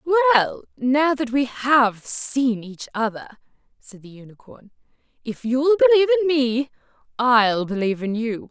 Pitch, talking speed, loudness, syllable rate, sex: 255 Hz, 140 wpm, -20 LUFS, 4.7 syllables/s, female